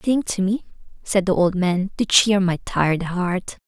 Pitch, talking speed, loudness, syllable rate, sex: 190 Hz, 195 wpm, -20 LUFS, 4.3 syllables/s, female